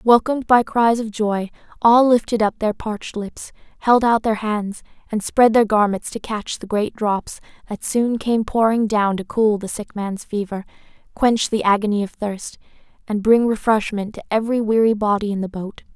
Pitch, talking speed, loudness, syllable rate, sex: 215 Hz, 190 wpm, -19 LUFS, 4.8 syllables/s, female